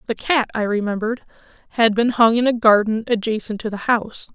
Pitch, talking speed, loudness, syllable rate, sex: 225 Hz, 195 wpm, -19 LUFS, 6.0 syllables/s, female